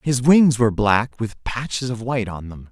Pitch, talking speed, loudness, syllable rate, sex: 120 Hz, 220 wpm, -19 LUFS, 5.0 syllables/s, male